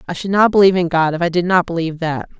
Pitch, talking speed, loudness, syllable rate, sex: 175 Hz, 300 wpm, -16 LUFS, 7.4 syllables/s, female